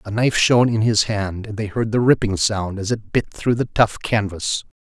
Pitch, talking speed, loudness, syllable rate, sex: 105 Hz, 235 wpm, -19 LUFS, 5.0 syllables/s, male